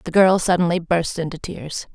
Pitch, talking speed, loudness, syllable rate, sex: 170 Hz, 185 wpm, -20 LUFS, 5.1 syllables/s, female